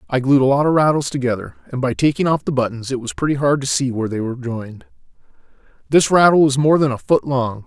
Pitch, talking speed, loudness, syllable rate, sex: 135 Hz, 245 wpm, -17 LUFS, 6.5 syllables/s, male